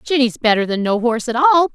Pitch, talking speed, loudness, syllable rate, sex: 250 Hz, 240 wpm, -16 LUFS, 7.3 syllables/s, female